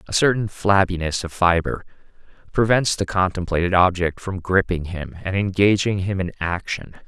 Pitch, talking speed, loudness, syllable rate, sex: 95 Hz, 145 wpm, -21 LUFS, 5.0 syllables/s, male